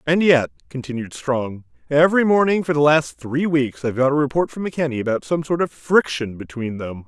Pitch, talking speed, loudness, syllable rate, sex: 140 Hz, 205 wpm, -20 LUFS, 5.7 syllables/s, male